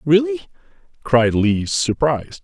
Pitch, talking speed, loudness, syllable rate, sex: 135 Hz, 100 wpm, -18 LUFS, 4.1 syllables/s, male